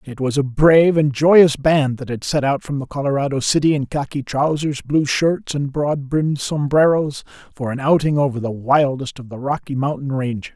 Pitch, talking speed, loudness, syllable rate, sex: 140 Hz, 200 wpm, -18 LUFS, 5.0 syllables/s, male